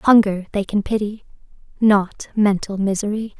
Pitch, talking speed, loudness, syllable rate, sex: 205 Hz, 105 wpm, -19 LUFS, 4.5 syllables/s, female